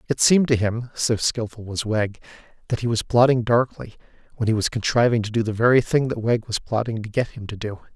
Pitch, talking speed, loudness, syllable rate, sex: 115 Hz, 235 wpm, -22 LUFS, 5.5 syllables/s, male